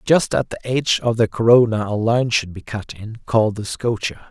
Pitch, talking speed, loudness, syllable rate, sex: 110 Hz, 225 wpm, -19 LUFS, 5.1 syllables/s, male